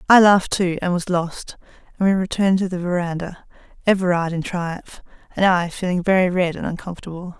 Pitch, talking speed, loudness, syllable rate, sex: 180 Hz, 170 wpm, -20 LUFS, 5.8 syllables/s, female